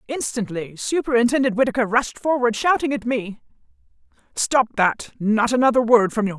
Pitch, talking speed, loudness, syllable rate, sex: 235 Hz, 140 wpm, -20 LUFS, 5.2 syllables/s, female